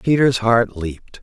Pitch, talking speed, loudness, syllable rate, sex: 115 Hz, 145 wpm, -17 LUFS, 4.4 syllables/s, male